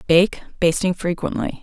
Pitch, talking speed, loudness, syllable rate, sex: 180 Hz, 110 wpm, -20 LUFS, 4.7 syllables/s, female